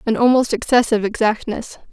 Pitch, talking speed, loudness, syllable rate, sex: 225 Hz, 125 wpm, -17 LUFS, 5.9 syllables/s, female